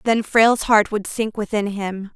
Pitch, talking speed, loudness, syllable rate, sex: 210 Hz, 195 wpm, -19 LUFS, 4.5 syllables/s, female